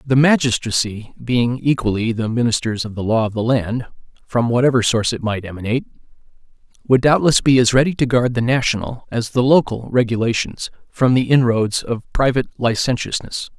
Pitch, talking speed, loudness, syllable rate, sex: 120 Hz, 165 wpm, -18 LUFS, 5.5 syllables/s, male